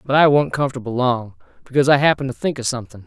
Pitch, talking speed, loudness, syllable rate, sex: 130 Hz, 235 wpm, -18 LUFS, 7.8 syllables/s, male